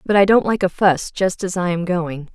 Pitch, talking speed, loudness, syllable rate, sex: 185 Hz, 280 wpm, -18 LUFS, 5.0 syllables/s, female